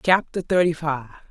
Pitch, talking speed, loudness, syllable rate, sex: 165 Hz, 140 wpm, -22 LUFS, 5.1 syllables/s, female